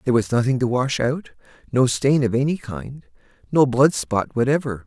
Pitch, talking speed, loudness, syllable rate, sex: 125 Hz, 160 wpm, -20 LUFS, 5.0 syllables/s, male